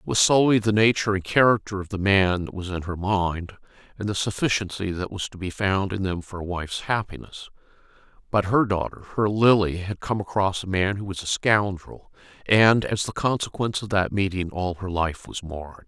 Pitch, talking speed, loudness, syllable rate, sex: 100 Hz, 210 wpm, -23 LUFS, 5.3 syllables/s, male